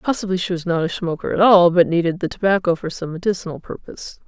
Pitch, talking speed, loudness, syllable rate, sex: 180 Hz, 225 wpm, -18 LUFS, 6.5 syllables/s, female